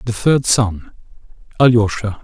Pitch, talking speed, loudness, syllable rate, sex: 110 Hz, 105 wpm, -15 LUFS, 4.3 syllables/s, male